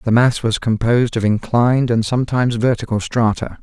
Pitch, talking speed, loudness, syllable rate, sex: 115 Hz, 165 wpm, -17 LUFS, 5.7 syllables/s, male